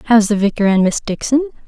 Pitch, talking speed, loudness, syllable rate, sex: 220 Hz, 215 wpm, -15 LUFS, 6.3 syllables/s, female